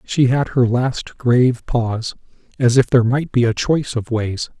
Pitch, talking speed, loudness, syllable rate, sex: 125 Hz, 195 wpm, -17 LUFS, 4.7 syllables/s, male